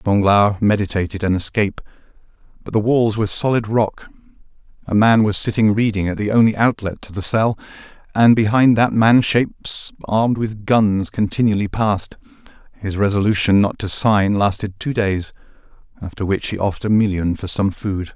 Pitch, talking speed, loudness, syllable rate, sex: 105 Hz, 160 wpm, -18 LUFS, 5.2 syllables/s, male